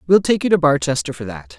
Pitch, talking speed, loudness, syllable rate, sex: 150 Hz, 265 wpm, -17 LUFS, 6.3 syllables/s, male